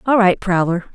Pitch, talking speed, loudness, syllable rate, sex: 195 Hz, 190 wpm, -16 LUFS, 5.6 syllables/s, female